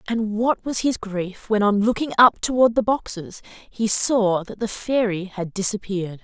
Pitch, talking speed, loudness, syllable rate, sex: 210 Hz, 185 wpm, -21 LUFS, 4.4 syllables/s, female